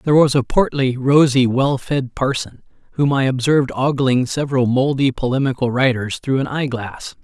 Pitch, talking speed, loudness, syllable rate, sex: 135 Hz, 160 wpm, -17 LUFS, 5.1 syllables/s, male